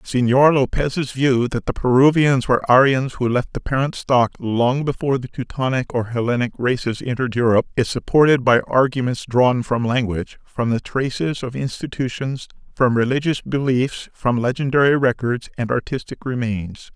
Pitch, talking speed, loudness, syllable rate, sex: 125 Hz, 150 wpm, -19 LUFS, 5.1 syllables/s, male